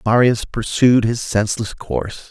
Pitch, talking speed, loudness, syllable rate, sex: 115 Hz, 130 wpm, -18 LUFS, 4.6 syllables/s, male